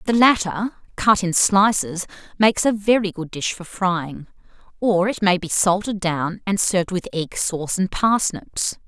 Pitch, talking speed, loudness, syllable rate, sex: 190 Hz, 170 wpm, -20 LUFS, 4.4 syllables/s, female